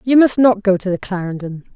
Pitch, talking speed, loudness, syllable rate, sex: 205 Hz, 240 wpm, -16 LUFS, 5.7 syllables/s, female